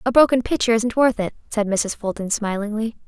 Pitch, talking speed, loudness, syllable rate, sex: 225 Hz, 195 wpm, -20 LUFS, 5.5 syllables/s, female